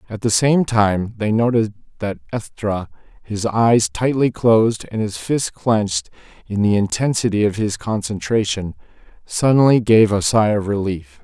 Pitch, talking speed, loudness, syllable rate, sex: 105 Hz, 150 wpm, -18 LUFS, 4.5 syllables/s, male